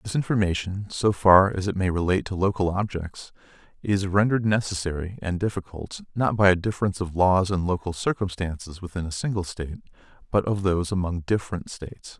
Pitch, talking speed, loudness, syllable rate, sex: 95 Hz, 170 wpm, -24 LUFS, 5.9 syllables/s, male